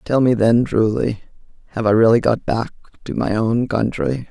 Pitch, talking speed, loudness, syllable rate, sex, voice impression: 115 Hz, 180 wpm, -18 LUFS, 4.8 syllables/s, female, feminine, very adult-like, slightly muffled, calm, slightly reassuring, elegant